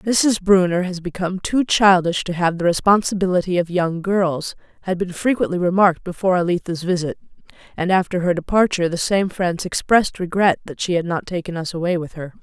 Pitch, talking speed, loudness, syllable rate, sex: 180 Hz, 185 wpm, -19 LUFS, 5.7 syllables/s, female